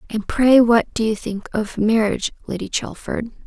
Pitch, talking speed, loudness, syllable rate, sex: 225 Hz, 175 wpm, -19 LUFS, 4.7 syllables/s, female